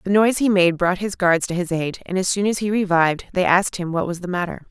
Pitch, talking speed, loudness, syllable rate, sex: 185 Hz, 295 wpm, -20 LUFS, 6.3 syllables/s, female